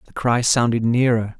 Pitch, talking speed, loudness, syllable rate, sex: 120 Hz, 175 wpm, -18 LUFS, 5.0 syllables/s, male